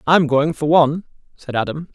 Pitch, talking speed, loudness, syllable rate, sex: 150 Hz, 185 wpm, -17 LUFS, 5.3 syllables/s, male